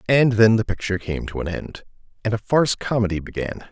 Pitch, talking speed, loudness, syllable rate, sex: 105 Hz, 210 wpm, -21 LUFS, 6.0 syllables/s, male